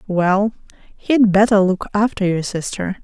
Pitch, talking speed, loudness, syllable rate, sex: 200 Hz, 140 wpm, -17 LUFS, 4.1 syllables/s, female